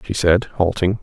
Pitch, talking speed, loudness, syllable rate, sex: 95 Hz, 175 wpm, -18 LUFS, 4.6 syllables/s, male